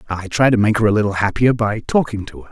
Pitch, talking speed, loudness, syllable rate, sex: 105 Hz, 285 wpm, -17 LUFS, 6.4 syllables/s, male